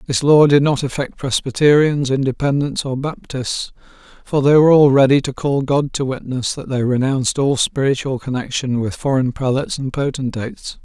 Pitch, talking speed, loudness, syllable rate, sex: 135 Hz, 165 wpm, -17 LUFS, 5.2 syllables/s, male